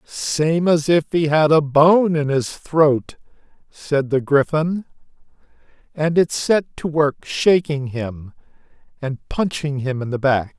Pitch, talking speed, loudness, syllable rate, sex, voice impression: 150 Hz, 145 wpm, -19 LUFS, 3.5 syllables/s, male, very masculine, slightly old, thick, tensed, slightly powerful, bright, soft, slightly muffled, fluent, slightly raspy, cool, intellectual, slightly refreshing, sincere, calm, mature, friendly, reassuring, very unique, slightly elegant, wild, slightly sweet, very lively, kind, intense, sharp